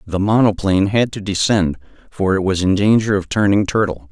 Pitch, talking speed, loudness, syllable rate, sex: 100 Hz, 190 wpm, -16 LUFS, 5.5 syllables/s, male